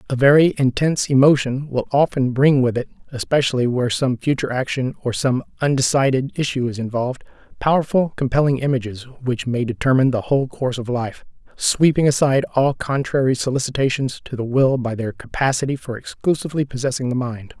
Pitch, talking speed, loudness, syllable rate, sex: 130 Hz, 155 wpm, -19 LUFS, 6.0 syllables/s, male